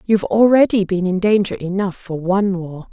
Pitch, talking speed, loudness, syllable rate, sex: 195 Hz, 185 wpm, -17 LUFS, 5.4 syllables/s, female